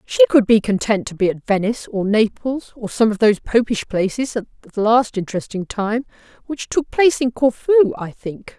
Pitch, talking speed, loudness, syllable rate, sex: 230 Hz, 195 wpm, -18 LUFS, 5.1 syllables/s, female